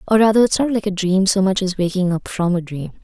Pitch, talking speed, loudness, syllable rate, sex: 190 Hz, 295 wpm, -17 LUFS, 6.1 syllables/s, female